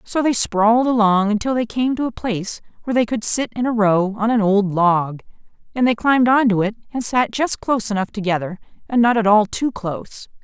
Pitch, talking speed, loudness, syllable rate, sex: 220 Hz, 220 wpm, -18 LUFS, 5.6 syllables/s, female